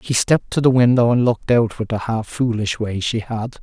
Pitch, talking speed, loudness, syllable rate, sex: 115 Hz, 250 wpm, -18 LUFS, 5.4 syllables/s, male